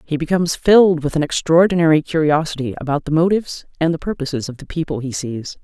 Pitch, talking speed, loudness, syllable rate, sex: 155 Hz, 180 wpm, -17 LUFS, 6.2 syllables/s, female